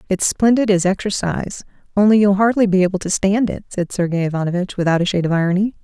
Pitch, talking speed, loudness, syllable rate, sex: 190 Hz, 205 wpm, -17 LUFS, 6.6 syllables/s, female